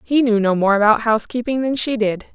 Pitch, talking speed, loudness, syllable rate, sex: 225 Hz, 230 wpm, -17 LUFS, 5.9 syllables/s, female